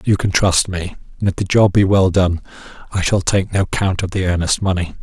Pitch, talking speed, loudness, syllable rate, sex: 95 Hz, 240 wpm, -17 LUFS, 5.3 syllables/s, male